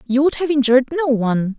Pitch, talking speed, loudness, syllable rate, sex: 265 Hz, 225 wpm, -17 LUFS, 6.3 syllables/s, female